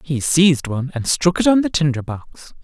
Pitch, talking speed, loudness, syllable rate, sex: 155 Hz, 230 wpm, -17 LUFS, 5.3 syllables/s, male